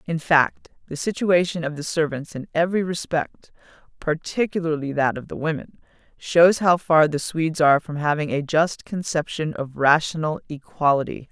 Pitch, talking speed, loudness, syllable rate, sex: 160 Hz, 155 wpm, -22 LUFS, 5.1 syllables/s, female